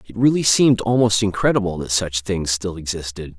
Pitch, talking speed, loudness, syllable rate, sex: 100 Hz, 175 wpm, -19 LUFS, 5.6 syllables/s, male